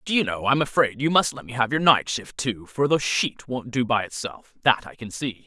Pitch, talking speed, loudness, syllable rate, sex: 125 Hz, 275 wpm, -23 LUFS, 5.4 syllables/s, male